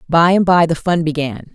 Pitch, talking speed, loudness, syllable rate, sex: 165 Hz, 235 wpm, -15 LUFS, 5.3 syllables/s, female